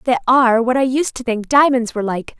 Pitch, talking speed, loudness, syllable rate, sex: 245 Hz, 250 wpm, -16 LUFS, 6.1 syllables/s, female